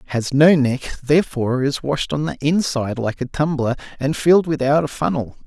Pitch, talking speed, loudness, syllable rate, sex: 140 Hz, 185 wpm, -19 LUFS, 5.3 syllables/s, male